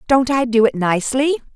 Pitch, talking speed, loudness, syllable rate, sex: 250 Hz, 195 wpm, -17 LUFS, 5.7 syllables/s, female